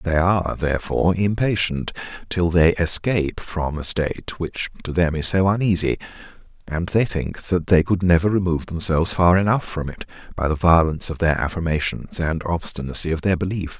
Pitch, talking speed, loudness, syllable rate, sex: 85 Hz, 175 wpm, -21 LUFS, 5.4 syllables/s, male